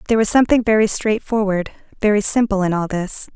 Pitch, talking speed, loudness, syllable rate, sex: 210 Hz, 180 wpm, -17 LUFS, 6.3 syllables/s, female